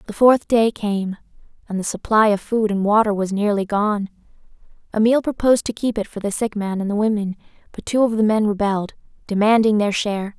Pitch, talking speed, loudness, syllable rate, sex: 210 Hz, 200 wpm, -19 LUFS, 5.6 syllables/s, female